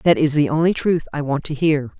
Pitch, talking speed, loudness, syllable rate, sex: 150 Hz, 270 wpm, -19 LUFS, 5.4 syllables/s, female